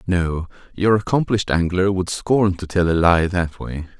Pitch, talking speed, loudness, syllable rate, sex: 90 Hz, 180 wpm, -19 LUFS, 4.6 syllables/s, male